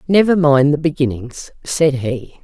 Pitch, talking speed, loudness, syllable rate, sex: 145 Hz, 150 wpm, -15 LUFS, 4.2 syllables/s, female